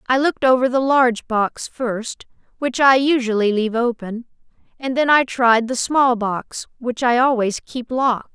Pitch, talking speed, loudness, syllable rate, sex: 245 Hz, 175 wpm, -18 LUFS, 4.6 syllables/s, female